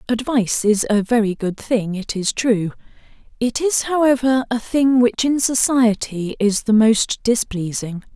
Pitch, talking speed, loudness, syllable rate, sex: 230 Hz, 155 wpm, -18 LUFS, 4.2 syllables/s, female